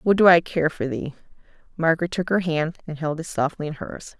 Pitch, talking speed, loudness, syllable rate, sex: 160 Hz, 230 wpm, -22 LUFS, 5.5 syllables/s, female